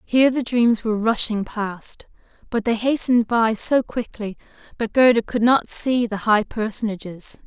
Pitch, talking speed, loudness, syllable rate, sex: 225 Hz, 160 wpm, -20 LUFS, 4.6 syllables/s, female